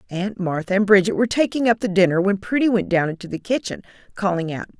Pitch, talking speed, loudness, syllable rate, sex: 195 Hz, 225 wpm, -20 LUFS, 6.5 syllables/s, female